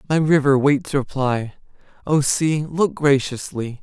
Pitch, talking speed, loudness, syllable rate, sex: 140 Hz, 125 wpm, -19 LUFS, 3.8 syllables/s, male